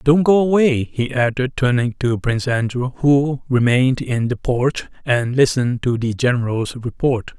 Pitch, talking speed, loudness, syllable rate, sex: 125 Hz, 160 wpm, -18 LUFS, 4.6 syllables/s, male